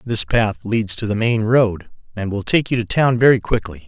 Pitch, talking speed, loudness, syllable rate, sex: 110 Hz, 230 wpm, -18 LUFS, 4.9 syllables/s, male